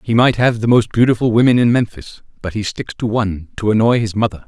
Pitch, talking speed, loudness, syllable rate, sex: 110 Hz, 240 wpm, -16 LUFS, 6.2 syllables/s, male